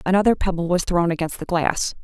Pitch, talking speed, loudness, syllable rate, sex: 175 Hz, 205 wpm, -21 LUFS, 5.9 syllables/s, female